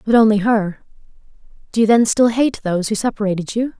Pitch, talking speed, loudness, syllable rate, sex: 215 Hz, 190 wpm, -17 LUFS, 6.1 syllables/s, female